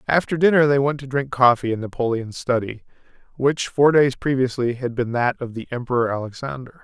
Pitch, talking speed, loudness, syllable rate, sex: 130 Hz, 185 wpm, -20 LUFS, 5.6 syllables/s, male